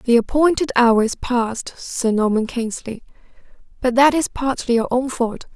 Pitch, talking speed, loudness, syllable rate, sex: 245 Hz, 160 wpm, -19 LUFS, 4.6 syllables/s, female